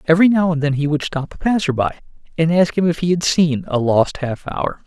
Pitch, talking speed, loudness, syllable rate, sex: 160 Hz, 260 wpm, -18 LUFS, 5.7 syllables/s, male